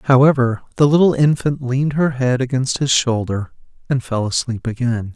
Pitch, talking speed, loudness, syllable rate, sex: 130 Hz, 165 wpm, -17 LUFS, 5.0 syllables/s, male